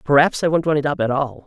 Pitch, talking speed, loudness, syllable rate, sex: 145 Hz, 330 wpm, -19 LUFS, 6.0 syllables/s, male